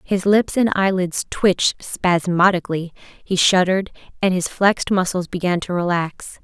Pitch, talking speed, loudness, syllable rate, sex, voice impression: 185 Hz, 140 wpm, -19 LUFS, 4.6 syllables/s, female, feminine, adult-like, tensed, slightly powerful, bright, fluent, friendly, slightly unique, lively, sharp